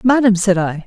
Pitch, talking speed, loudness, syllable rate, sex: 205 Hz, 210 wpm, -15 LUFS, 5.2 syllables/s, female